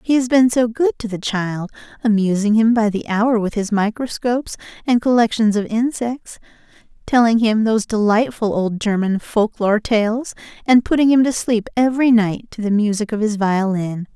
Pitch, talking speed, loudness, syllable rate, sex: 220 Hz, 180 wpm, -17 LUFS, 4.9 syllables/s, female